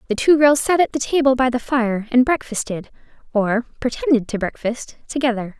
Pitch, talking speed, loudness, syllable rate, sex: 250 Hz, 180 wpm, -19 LUFS, 5.3 syllables/s, female